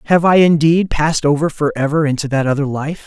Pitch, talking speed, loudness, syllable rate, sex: 150 Hz, 195 wpm, -15 LUFS, 5.9 syllables/s, male